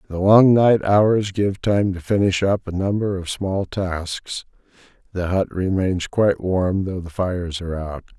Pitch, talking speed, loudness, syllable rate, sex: 95 Hz, 170 wpm, -20 LUFS, 4.2 syllables/s, male